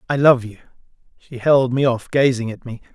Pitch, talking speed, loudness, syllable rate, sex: 125 Hz, 205 wpm, -18 LUFS, 5.6 syllables/s, male